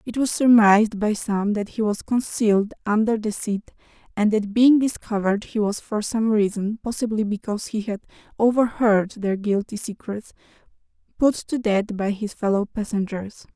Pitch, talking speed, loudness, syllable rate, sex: 215 Hz, 160 wpm, -22 LUFS, 4.9 syllables/s, female